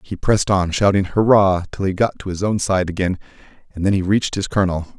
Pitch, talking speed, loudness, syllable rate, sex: 95 Hz, 230 wpm, -18 LUFS, 6.2 syllables/s, male